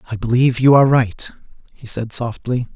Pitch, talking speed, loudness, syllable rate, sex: 120 Hz, 175 wpm, -17 LUFS, 5.9 syllables/s, male